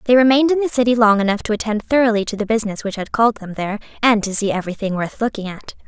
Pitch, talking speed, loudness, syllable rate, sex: 220 Hz, 255 wpm, -18 LUFS, 7.4 syllables/s, female